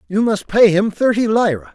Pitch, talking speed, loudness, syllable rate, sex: 200 Hz, 205 wpm, -15 LUFS, 5.1 syllables/s, male